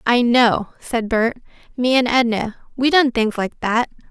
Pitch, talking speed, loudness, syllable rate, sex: 240 Hz, 160 wpm, -18 LUFS, 4.2 syllables/s, female